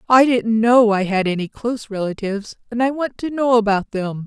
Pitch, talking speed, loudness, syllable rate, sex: 225 Hz, 210 wpm, -18 LUFS, 5.3 syllables/s, female